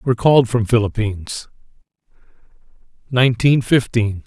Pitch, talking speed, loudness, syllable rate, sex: 115 Hz, 70 wpm, -17 LUFS, 5.0 syllables/s, male